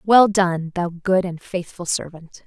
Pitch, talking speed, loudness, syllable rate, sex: 180 Hz, 170 wpm, -20 LUFS, 4.1 syllables/s, female